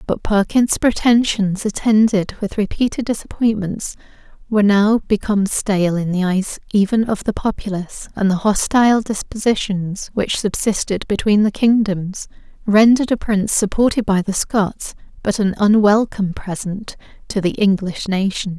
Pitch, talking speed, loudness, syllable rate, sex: 205 Hz, 135 wpm, -17 LUFS, 4.8 syllables/s, female